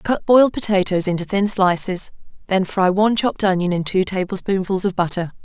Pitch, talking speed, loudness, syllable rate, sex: 190 Hz, 175 wpm, -18 LUFS, 5.6 syllables/s, female